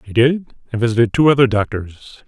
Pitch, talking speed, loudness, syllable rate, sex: 120 Hz, 185 wpm, -16 LUFS, 5.5 syllables/s, male